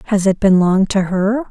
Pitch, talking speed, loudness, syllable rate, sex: 200 Hz, 240 wpm, -15 LUFS, 4.7 syllables/s, female